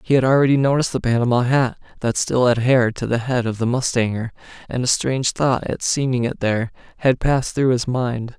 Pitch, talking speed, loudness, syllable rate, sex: 125 Hz, 210 wpm, -19 LUFS, 5.7 syllables/s, male